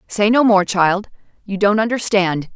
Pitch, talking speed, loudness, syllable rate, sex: 200 Hz, 165 wpm, -16 LUFS, 4.4 syllables/s, female